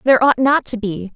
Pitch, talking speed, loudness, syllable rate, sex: 240 Hz, 260 wpm, -16 LUFS, 5.7 syllables/s, female